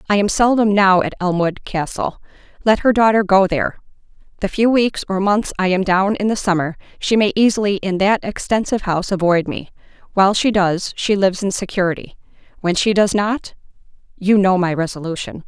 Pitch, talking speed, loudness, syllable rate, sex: 195 Hz, 170 wpm, -17 LUFS, 5.5 syllables/s, female